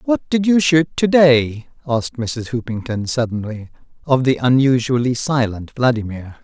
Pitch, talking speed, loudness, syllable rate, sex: 130 Hz, 140 wpm, -17 LUFS, 4.6 syllables/s, male